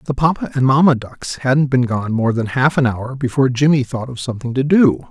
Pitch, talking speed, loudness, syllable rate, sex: 130 Hz, 235 wpm, -17 LUFS, 5.5 syllables/s, male